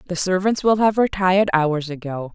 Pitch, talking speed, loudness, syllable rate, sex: 180 Hz, 180 wpm, -19 LUFS, 5.2 syllables/s, female